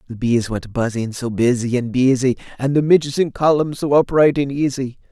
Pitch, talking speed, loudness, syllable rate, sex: 130 Hz, 200 wpm, -18 LUFS, 5.2 syllables/s, male